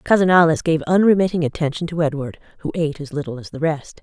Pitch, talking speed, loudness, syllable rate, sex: 160 Hz, 210 wpm, -19 LUFS, 6.7 syllables/s, female